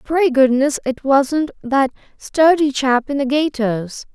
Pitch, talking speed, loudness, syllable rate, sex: 270 Hz, 145 wpm, -17 LUFS, 3.7 syllables/s, female